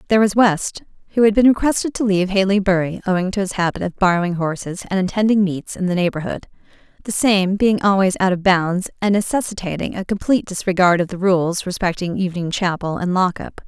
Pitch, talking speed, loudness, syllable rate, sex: 190 Hz, 195 wpm, -18 LUFS, 6.0 syllables/s, female